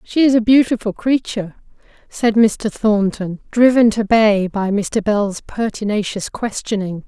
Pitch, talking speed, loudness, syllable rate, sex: 215 Hz, 135 wpm, -17 LUFS, 4.2 syllables/s, female